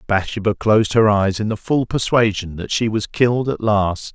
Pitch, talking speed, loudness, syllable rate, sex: 105 Hz, 205 wpm, -18 LUFS, 5.0 syllables/s, male